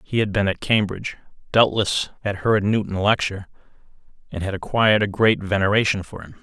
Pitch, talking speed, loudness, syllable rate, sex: 100 Hz, 170 wpm, -20 LUFS, 5.8 syllables/s, male